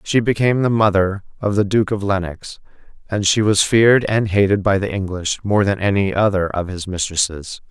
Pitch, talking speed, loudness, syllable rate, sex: 100 Hz, 195 wpm, -17 LUFS, 5.2 syllables/s, male